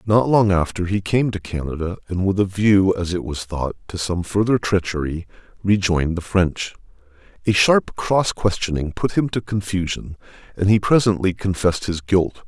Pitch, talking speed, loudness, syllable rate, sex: 95 Hz, 175 wpm, -20 LUFS, 5.0 syllables/s, male